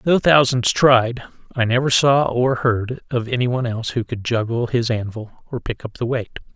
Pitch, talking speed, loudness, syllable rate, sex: 120 Hz, 190 wpm, -19 LUFS, 4.8 syllables/s, male